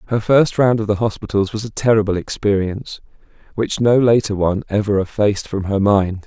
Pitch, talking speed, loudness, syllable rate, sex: 105 Hz, 180 wpm, -17 LUFS, 5.7 syllables/s, male